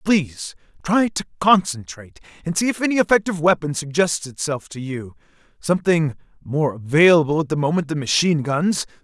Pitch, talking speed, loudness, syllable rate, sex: 160 Hz, 145 wpm, -19 LUFS, 5.7 syllables/s, male